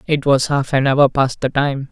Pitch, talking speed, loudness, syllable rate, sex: 135 Hz, 250 wpm, -16 LUFS, 4.6 syllables/s, male